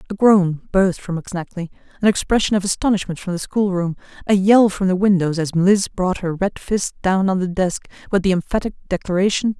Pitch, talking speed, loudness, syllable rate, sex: 190 Hz, 195 wpm, -19 LUFS, 5.6 syllables/s, female